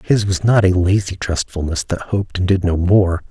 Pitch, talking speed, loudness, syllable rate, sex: 95 Hz, 220 wpm, -17 LUFS, 5.1 syllables/s, male